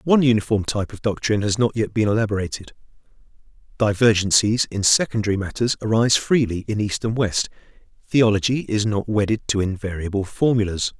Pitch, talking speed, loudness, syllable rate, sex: 105 Hz, 145 wpm, -20 LUFS, 6.0 syllables/s, male